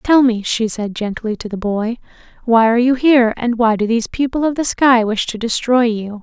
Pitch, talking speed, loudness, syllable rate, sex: 235 Hz, 230 wpm, -16 LUFS, 5.2 syllables/s, female